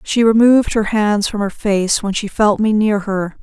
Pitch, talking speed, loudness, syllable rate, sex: 210 Hz, 230 wpm, -15 LUFS, 4.6 syllables/s, female